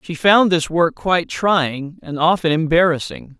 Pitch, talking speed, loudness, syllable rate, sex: 165 Hz, 160 wpm, -17 LUFS, 4.3 syllables/s, male